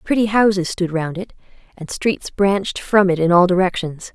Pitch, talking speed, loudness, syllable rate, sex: 185 Hz, 190 wpm, -17 LUFS, 5.0 syllables/s, female